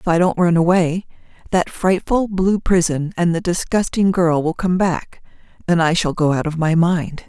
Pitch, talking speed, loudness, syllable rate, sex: 175 Hz, 200 wpm, -18 LUFS, 4.6 syllables/s, female